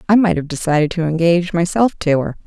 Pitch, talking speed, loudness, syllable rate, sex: 170 Hz, 220 wpm, -16 LUFS, 6.3 syllables/s, female